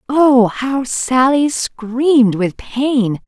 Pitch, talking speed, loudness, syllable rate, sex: 255 Hz, 110 wpm, -15 LUFS, 2.6 syllables/s, female